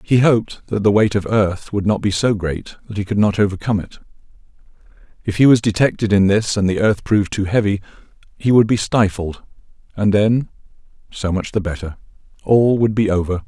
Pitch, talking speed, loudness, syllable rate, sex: 105 Hz, 190 wpm, -17 LUFS, 5.6 syllables/s, male